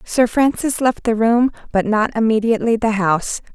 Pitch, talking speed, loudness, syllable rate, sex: 225 Hz, 170 wpm, -17 LUFS, 5.1 syllables/s, female